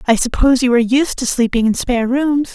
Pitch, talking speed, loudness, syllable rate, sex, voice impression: 250 Hz, 235 wpm, -15 LUFS, 6.3 syllables/s, female, feminine, slightly middle-aged, relaxed, weak, slightly dark, soft, calm, elegant, slightly kind, slightly modest